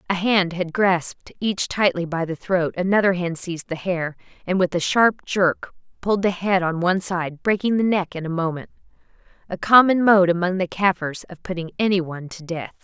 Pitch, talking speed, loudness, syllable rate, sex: 185 Hz, 195 wpm, -21 LUFS, 5.3 syllables/s, female